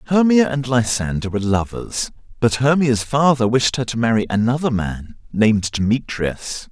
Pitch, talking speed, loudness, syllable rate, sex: 120 Hz, 145 wpm, -18 LUFS, 4.8 syllables/s, male